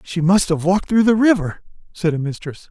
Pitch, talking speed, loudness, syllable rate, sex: 180 Hz, 220 wpm, -17 LUFS, 5.6 syllables/s, male